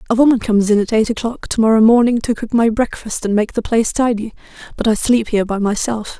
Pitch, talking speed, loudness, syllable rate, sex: 225 Hz, 240 wpm, -16 LUFS, 6.3 syllables/s, female